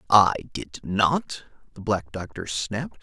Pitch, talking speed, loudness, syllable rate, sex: 105 Hz, 140 wpm, -25 LUFS, 3.9 syllables/s, male